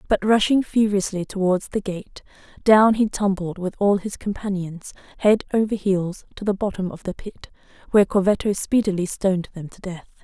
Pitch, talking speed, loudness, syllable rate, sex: 195 Hz, 170 wpm, -21 LUFS, 5.1 syllables/s, female